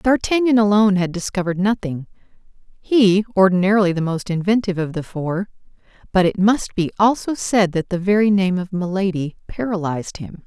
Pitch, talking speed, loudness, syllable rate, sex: 195 Hz, 150 wpm, -18 LUFS, 5.5 syllables/s, female